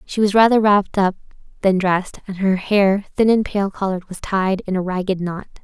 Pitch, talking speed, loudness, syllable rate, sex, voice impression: 195 Hz, 215 wpm, -18 LUFS, 5.4 syllables/s, female, feminine, adult-like, slightly relaxed, soft, intellectual, slightly calm, friendly, slightly reassuring, lively, kind, slightly modest